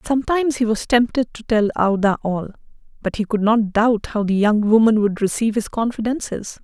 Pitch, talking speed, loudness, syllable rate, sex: 220 Hz, 190 wpm, -19 LUFS, 5.7 syllables/s, female